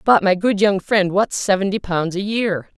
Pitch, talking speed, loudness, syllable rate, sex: 195 Hz, 215 wpm, -18 LUFS, 4.6 syllables/s, female